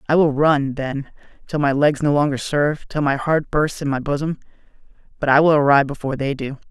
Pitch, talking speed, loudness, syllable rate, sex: 145 Hz, 215 wpm, -19 LUFS, 5.9 syllables/s, male